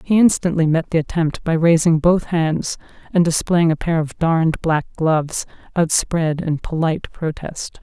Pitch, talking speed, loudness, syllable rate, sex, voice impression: 165 Hz, 160 wpm, -18 LUFS, 4.6 syllables/s, female, feminine, adult-like, tensed, slightly powerful, slightly dark, fluent, intellectual, calm, reassuring, elegant, modest